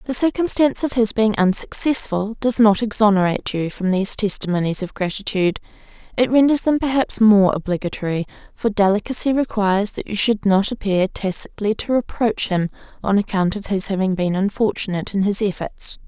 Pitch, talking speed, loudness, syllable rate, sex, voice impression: 210 Hz, 160 wpm, -19 LUFS, 5.6 syllables/s, female, very feminine, slightly young, very adult-like, very thin, tensed, slightly powerful, bright, hard, clear, fluent, slightly raspy, cute, slightly cool, intellectual, very refreshing, sincere, calm, very friendly, very reassuring, unique, elegant, wild, sweet, lively, slightly strict, slightly intense, slightly sharp